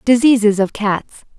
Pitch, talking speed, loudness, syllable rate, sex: 220 Hz, 130 wpm, -15 LUFS, 4.2 syllables/s, female